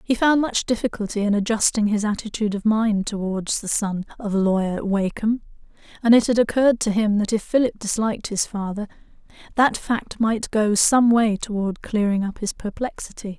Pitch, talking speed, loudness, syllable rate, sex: 215 Hz, 175 wpm, -21 LUFS, 5.2 syllables/s, female